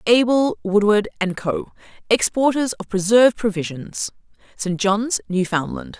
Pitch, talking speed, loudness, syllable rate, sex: 215 Hz, 110 wpm, -20 LUFS, 4.5 syllables/s, female